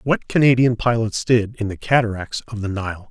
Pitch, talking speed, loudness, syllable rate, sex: 115 Hz, 195 wpm, -19 LUFS, 5.1 syllables/s, male